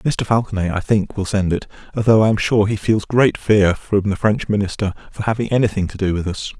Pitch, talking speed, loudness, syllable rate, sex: 105 Hz, 245 wpm, -18 LUFS, 5.6 syllables/s, male